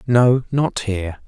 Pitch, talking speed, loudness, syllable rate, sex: 115 Hz, 140 wpm, -19 LUFS, 3.9 syllables/s, male